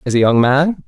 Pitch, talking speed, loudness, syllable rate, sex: 140 Hz, 275 wpm, -14 LUFS, 5.3 syllables/s, male